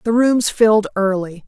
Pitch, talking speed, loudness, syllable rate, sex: 210 Hz, 165 wpm, -16 LUFS, 4.7 syllables/s, female